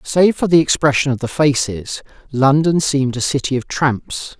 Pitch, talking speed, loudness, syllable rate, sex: 140 Hz, 175 wpm, -16 LUFS, 4.8 syllables/s, male